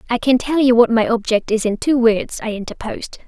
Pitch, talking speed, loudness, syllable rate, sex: 235 Hz, 240 wpm, -17 LUFS, 5.7 syllables/s, female